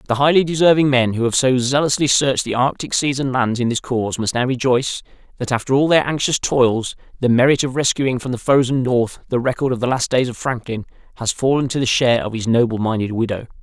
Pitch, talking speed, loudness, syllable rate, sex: 125 Hz, 230 wpm, -18 LUFS, 6.0 syllables/s, male